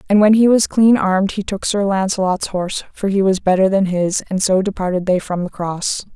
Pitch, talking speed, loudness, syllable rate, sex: 190 Hz, 235 wpm, -16 LUFS, 5.4 syllables/s, female